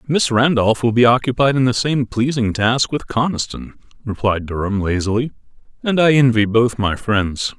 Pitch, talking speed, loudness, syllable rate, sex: 120 Hz, 165 wpm, -17 LUFS, 4.9 syllables/s, male